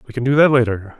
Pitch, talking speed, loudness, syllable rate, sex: 125 Hz, 305 wpm, -16 LUFS, 7.1 syllables/s, male